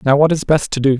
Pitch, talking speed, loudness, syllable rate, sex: 145 Hz, 360 wpm, -15 LUFS, 6.9 syllables/s, male